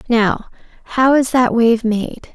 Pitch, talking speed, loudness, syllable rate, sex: 235 Hz, 155 wpm, -15 LUFS, 3.6 syllables/s, female